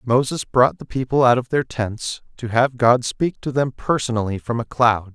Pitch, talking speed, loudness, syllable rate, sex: 120 Hz, 210 wpm, -20 LUFS, 4.7 syllables/s, male